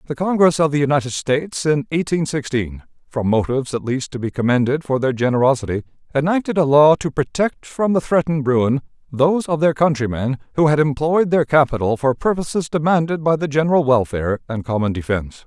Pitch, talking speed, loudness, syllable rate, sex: 140 Hz, 180 wpm, -18 LUFS, 5.9 syllables/s, male